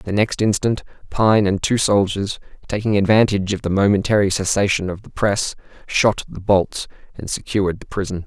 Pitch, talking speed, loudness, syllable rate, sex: 100 Hz, 165 wpm, -19 LUFS, 5.2 syllables/s, male